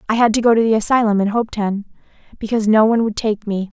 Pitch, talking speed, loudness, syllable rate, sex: 215 Hz, 220 wpm, -17 LUFS, 7.3 syllables/s, female